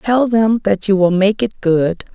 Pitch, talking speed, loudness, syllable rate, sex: 205 Hz, 225 wpm, -15 LUFS, 4.0 syllables/s, female